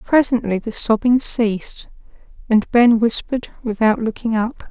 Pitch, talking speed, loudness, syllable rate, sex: 230 Hz, 125 wpm, -17 LUFS, 4.6 syllables/s, female